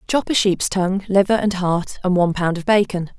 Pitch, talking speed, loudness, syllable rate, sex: 190 Hz, 225 wpm, -19 LUFS, 5.5 syllables/s, female